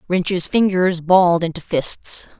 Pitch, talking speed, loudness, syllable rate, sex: 175 Hz, 125 wpm, -17 LUFS, 3.8 syllables/s, female